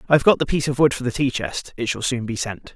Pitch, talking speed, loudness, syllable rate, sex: 130 Hz, 350 wpm, -21 LUFS, 6.7 syllables/s, male